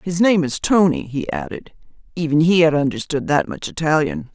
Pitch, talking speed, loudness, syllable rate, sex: 160 Hz, 165 wpm, -18 LUFS, 5.2 syllables/s, female